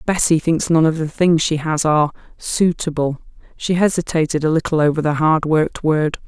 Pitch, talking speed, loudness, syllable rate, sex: 160 Hz, 170 wpm, -17 LUFS, 5.3 syllables/s, female